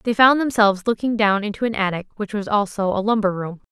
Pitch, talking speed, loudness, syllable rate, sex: 210 Hz, 225 wpm, -20 LUFS, 6.1 syllables/s, female